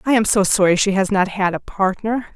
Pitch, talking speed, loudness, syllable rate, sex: 200 Hz, 255 wpm, -18 LUFS, 5.4 syllables/s, female